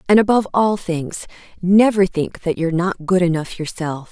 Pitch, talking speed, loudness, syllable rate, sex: 180 Hz, 175 wpm, -18 LUFS, 5.1 syllables/s, female